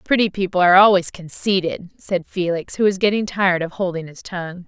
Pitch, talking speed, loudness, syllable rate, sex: 185 Hz, 195 wpm, -19 LUFS, 5.8 syllables/s, female